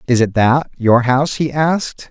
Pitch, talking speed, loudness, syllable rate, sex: 130 Hz, 200 wpm, -15 LUFS, 4.8 syllables/s, male